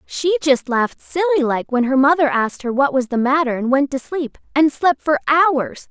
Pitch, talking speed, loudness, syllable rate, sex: 280 Hz, 225 wpm, -17 LUFS, 5.3 syllables/s, female